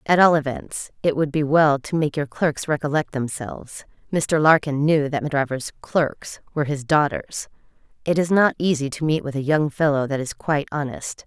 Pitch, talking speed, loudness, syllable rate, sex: 150 Hz, 190 wpm, -21 LUFS, 4.5 syllables/s, female